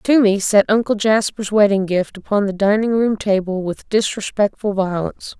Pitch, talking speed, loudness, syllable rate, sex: 205 Hz, 155 wpm, -17 LUFS, 4.9 syllables/s, female